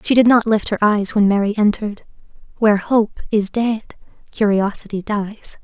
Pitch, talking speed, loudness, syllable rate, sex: 210 Hz, 160 wpm, -17 LUFS, 5.0 syllables/s, female